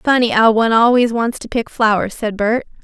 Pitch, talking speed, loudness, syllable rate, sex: 230 Hz, 210 wpm, -15 LUFS, 5.5 syllables/s, female